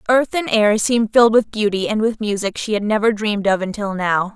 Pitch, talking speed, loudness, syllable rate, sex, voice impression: 215 Hz, 235 wpm, -18 LUFS, 5.8 syllables/s, female, feminine, adult-like, tensed, powerful, bright, clear, fluent, intellectual, friendly, slightly unique, lively, slightly light